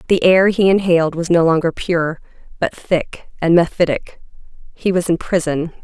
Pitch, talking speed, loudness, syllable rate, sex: 170 Hz, 155 wpm, -16 LUFS, 5.0 syllables/s, female